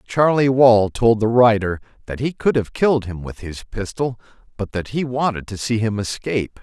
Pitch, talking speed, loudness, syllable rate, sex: 115 Hz, 200 wpm, -19 LUFS, 5.0 syllables/s, male